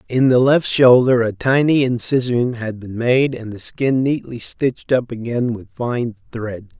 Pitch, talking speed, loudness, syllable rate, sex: 120 Hz, 175 wpm, -18 LUFS, 4.2 syllables/s, male